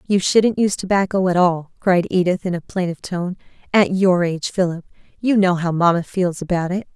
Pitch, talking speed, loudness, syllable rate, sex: 180 Hz, 200 wpm, -19 LUFS, 5.5 syllables/s, female